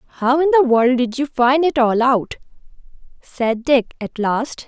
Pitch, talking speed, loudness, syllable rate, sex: 255 Hz, 180 wpm, -17 LUFS, 4.3 syllables/s, female